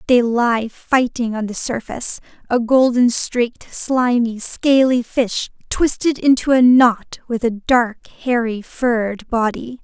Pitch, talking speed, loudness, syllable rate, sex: 240 Hz, 130 wpm, -17 LUFS, 3.9 syllables/s, female